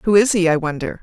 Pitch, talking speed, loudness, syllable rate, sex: 180 Hz, 295 wpm, -17 LUFS, 6.6 syllables/s, female